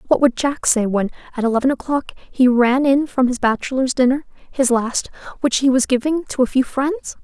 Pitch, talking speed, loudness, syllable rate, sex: 260 Hz, 190 wpm, -18 LUFS, 5.3 syllables/s, female